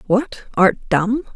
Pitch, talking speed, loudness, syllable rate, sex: 220 Hz, 135 wpm, -18 LUFS, 3.3 syllables/s, female